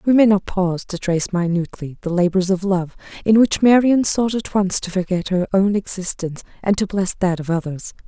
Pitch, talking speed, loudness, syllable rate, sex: 190 Hz, 210 wpm, -19 LUFS, 5.5 syllables/s, female